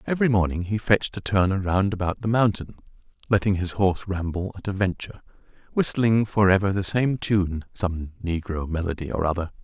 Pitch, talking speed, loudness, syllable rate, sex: 95 Hz, 170 wpm, -24 LUFS, 5.5 syllables/s, male